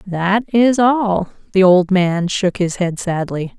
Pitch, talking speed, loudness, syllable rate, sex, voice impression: 190 Hz, 165 wpm, -16 LUFS, 3.5 syllables/s, female, feminine, slightly gender-neutral, adult-like, slightly middle-aged, slightly thin, tensed, slightly powerful, bright, slightly soft, clear, fluent, cool, intellectual, slightly refreshing, sincere, calm, friendly, slightly reassuring, unique, slightly elegant, lively, slightly strict, slightly intense